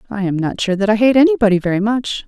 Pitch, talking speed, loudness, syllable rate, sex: 215 Hz, 265 wpm, -15 LUFS, 6.8 syllables/s, female